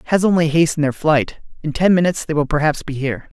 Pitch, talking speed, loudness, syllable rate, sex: 155 Hz, 230 wpm, -17 LUFS, 7.0 syllables/s, male